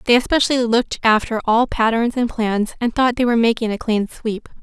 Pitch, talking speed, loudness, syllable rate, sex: 230 Hz, 205 wpm, -18 LUFS, 5.8 syllables/s, female